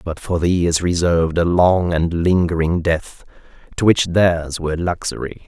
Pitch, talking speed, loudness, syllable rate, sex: 85 Hz, 165 wpm, -18 LUFS, 4.6 syllables/s, male